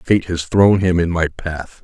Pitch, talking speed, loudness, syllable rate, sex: 85 Hz, 230 wpm, -17 LUFS, 3.9 syllables/s, male